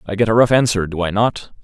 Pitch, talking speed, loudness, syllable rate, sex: 105 Hz, 295 wpm, -16 LUFS, 6.2 syllables/s, male